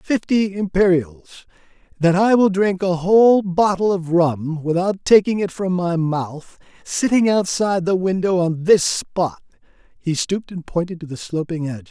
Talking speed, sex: 205 wpm, male